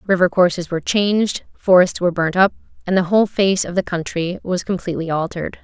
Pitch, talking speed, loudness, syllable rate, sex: 180 Hz, 190 wpm, -18 LUFS, 6.1 syllables/s, female